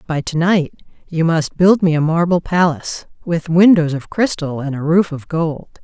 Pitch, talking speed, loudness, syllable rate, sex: 165 Hz, 195 wpm, -16 LUFS, 4.8 syllables/s, female